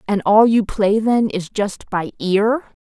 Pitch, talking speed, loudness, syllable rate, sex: 210 Hz, 190 wpm, -17 LUFS, 3.7 syllables/s, female